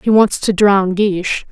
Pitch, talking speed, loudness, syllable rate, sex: 200 Hz, 200 wpm, -14 LUFS, 4.1 syllables/s, female